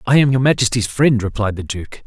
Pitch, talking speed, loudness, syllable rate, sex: 115 Hz, 230 wpm, -17 LUFS, 5.8 syllables/s, male